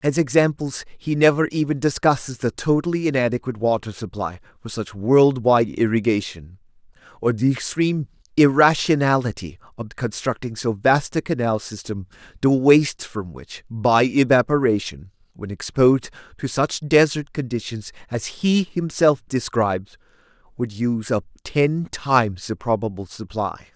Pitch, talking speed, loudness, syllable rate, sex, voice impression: 120 Hz, 125 wpm, -21 LUFS, 4.8 syllables/s, male, masculine, adult-like, fluent, slightly refreshing, sincere, slightly lively